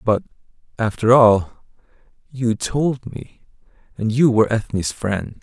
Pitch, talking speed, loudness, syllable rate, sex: 115 Hz, 120 wpm, -18 LUFS, 3.8 syllables/s, male